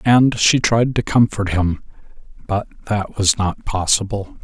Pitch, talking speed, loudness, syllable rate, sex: 105 Hz, 150 wpm, -18 LUFS, 4.1 syllables/s, male